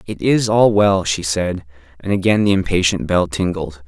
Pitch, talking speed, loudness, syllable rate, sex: 90 Hz, 185 wpm, -17 LUFS, 4.7 syllables/s, male